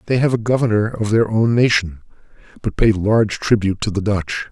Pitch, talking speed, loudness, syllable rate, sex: 110 Hz, 200 wpm, -17 LUFS, 5.7 syllables/s, male